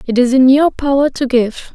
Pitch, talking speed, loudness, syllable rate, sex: 260 Hz, 240 wpm, -13 LUFS, 4.8 syllables/s, female